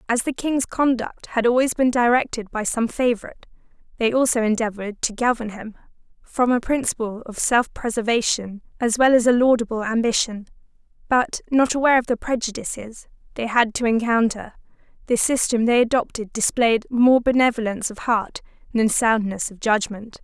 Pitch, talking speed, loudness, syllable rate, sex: 235 Hz, 155 wpm, -21 LUFS, 5.3 syllables/s, female